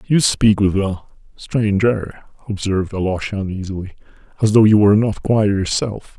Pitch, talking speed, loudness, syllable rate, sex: 100 Hz, 155 wpm, -17 LUFS, 5.4 syllables/s, male